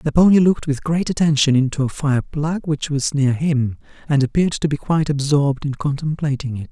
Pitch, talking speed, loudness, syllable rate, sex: 145 Hz, 205 wpm, -19 LUFS, 5.6 syllables/s, male